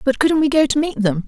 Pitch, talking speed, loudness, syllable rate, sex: 270 Hz, 330 wpm, -17 LUFS, 6.0 syllables/s, female